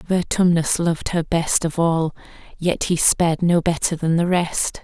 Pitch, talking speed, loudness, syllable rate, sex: 165 Hz, 185 wpm, -19 LUFS, 4.5 syllables/s, female